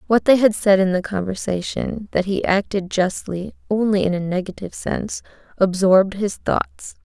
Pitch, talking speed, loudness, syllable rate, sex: 195 Hz, 160 wpm, -20 LUFS, 4.9 syllables/s, female